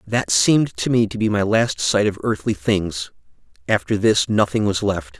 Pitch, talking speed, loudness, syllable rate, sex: 110 Hz, 195 wpm, -19 LUFS, 4.7 syllables/s, male